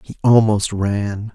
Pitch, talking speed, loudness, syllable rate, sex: 105 Hz, 135 wpm, -17 LUFS, 3.4 syllables/s, male